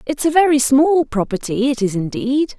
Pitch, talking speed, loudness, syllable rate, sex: 265 Hz, 185 wpm, -16 LUFS, 4.9 syllables/s, female